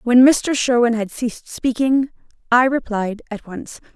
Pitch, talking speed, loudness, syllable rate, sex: 240 Hz, 150 wpm, -18 LUFS, 4.3 syllables/s, female